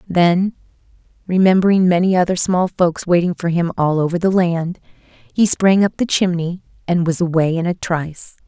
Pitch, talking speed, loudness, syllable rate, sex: 175 Hz, 170 wpm, -17 LUFS, 5.1 syllables/s, female